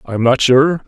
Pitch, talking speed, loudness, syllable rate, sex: 135 Hz, 275 wpm, -13 LUFS, 5.6 syllables/s, male